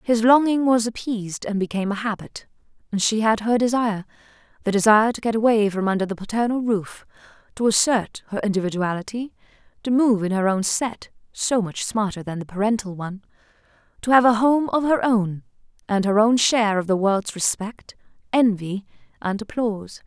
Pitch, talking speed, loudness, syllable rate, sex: 215 Hz, 170 wpm, -21 LUFS, 5.0 syllables/s, female